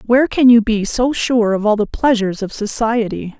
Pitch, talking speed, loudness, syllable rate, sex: 225 Hz, 210 wpm, -15 LUFS, 5.2 syllables/s, female